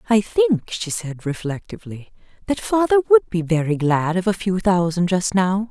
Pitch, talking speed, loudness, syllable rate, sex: 195 Hz, 180 wpm, -20 LUFS, 4.7 syllables/s, female